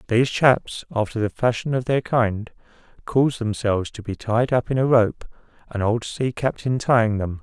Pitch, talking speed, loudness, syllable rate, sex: 115 Hz, 185 wpm, -21 LUFS, 5.0 syllables/s, male